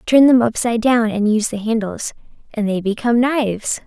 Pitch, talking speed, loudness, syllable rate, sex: 225 Hz, 185 wpm, -17 LUFS, 6.0 syllables/s, female